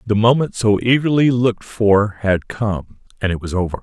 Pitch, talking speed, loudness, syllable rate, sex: 105 Hz, 190 wpm, -17 LUFS, 4.9 syllables/s, male